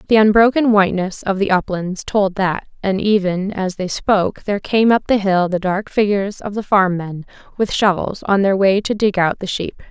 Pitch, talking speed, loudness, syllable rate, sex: 195 Hz, 210 wpm, -17 LUFS, 5.1 syllables/s, female